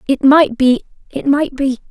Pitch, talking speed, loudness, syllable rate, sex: 270 Hz, 155 wpm, -14 LUFS, 4.3 syllables/s, female